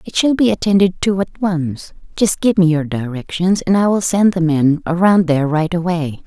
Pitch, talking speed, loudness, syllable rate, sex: 175 Hz, 210 wpm, -16 LUFS, 5.0 syllables/s, female